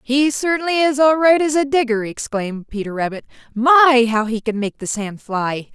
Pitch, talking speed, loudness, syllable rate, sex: 250 Hz, 200 wpm, -17 LUFS, 5.0 syllables/s, female